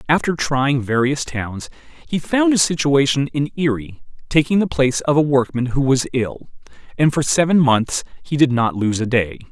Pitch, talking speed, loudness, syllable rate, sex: 135 Hz, 185 wpm, -18 LUFS, 4.9 syllables/s, male